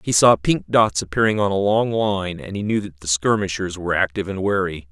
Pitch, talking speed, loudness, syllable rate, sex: 100 Hz, 230 wpm, -20 LUFS, 5.7 syllables/s, male